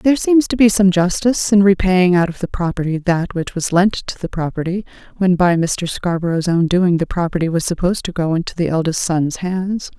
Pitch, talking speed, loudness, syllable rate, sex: 180 Hz, 215 wpm, -17 LUFS, 5.5 syllables/s, female